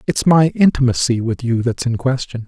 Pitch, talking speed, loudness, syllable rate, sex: 125 Hz, 195 wpm, -16 LUFS, 5.2 syllables/s, male